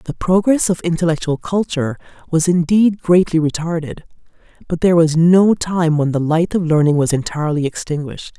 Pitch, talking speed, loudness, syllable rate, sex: 165 Hz, 155 wpm, -16 LUFS, 5.6 syllables/s, female